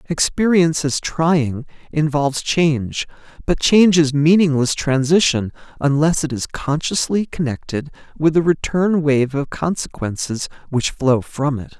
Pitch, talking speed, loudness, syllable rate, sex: 150 Hz, 125 wpm, -18 LUFS, 4.4 syllables/s, male